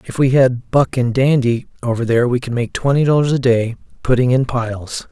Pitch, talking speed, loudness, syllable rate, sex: 125 Hz, 210 wpm, -16 LUFS, 5.5 syllables/s, male